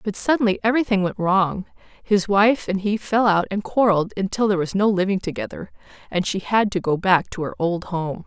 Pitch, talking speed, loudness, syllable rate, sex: 195 Hz, 210 wpm, -21 LUFS, 5.6 syllables/s, female